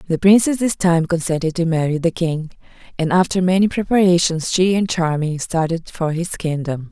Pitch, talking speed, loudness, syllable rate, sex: 170 Hz, 175 wpm, -18 LUFS, 5.1 syllables/s, female